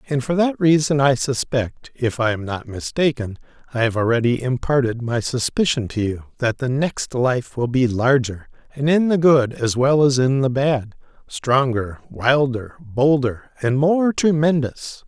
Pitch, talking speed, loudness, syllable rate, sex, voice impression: 130 Hz, 160 wpm, -19 LUFS, 4.3 syllables/s, male, very masculine, slightly old, very thick, tensed, powerful, slightly dark, soft, slightly muffled, fluent, raspy, slightly cool, intellectual, slightly refreshing, sincere, very calm, very mature, slightly friendly, reassuring, very unique, slightly elegant, wild, slightly sweet, lively, kind, slightly intense, modest